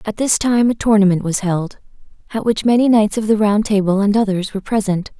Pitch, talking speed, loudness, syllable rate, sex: 210 Hz, 220 wpm, -16 LUFS, 5.8 syllables/s, female